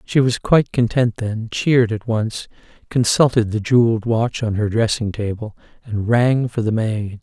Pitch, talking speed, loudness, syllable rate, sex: 115 Hz, 175 wpm, -18 LUFS, 4.8 syllables/s, male